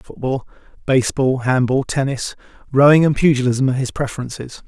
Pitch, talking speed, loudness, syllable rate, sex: 130 Hz, 130 wpm, -17 LUFS, 5.8 syllables/s, male